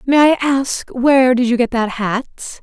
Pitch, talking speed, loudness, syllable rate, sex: 255 Hz, 205 wpm, -15 LUFS, 4.1 syllables/s, female